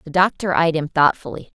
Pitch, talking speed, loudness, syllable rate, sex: 160 Hz, 190 wpm, -18 LUFS, 5.6 syllables/s, female